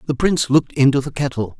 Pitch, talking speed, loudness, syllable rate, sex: 140 Hz, 225 wpm, -18 LUFS, 7.0 syllables/s, male